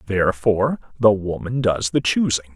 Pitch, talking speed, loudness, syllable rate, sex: 105 Hz, 140 wpm, -20 LUFS, 5.2 syllables/s, male